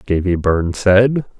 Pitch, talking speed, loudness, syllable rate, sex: 100 Hz, 130 wpm, -15 LUFS, 4.2 syllables/s, male